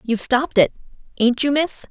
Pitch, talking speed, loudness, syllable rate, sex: 255 Hz, 155 wpm, -19 LUFS, 5.9 syllables/s, female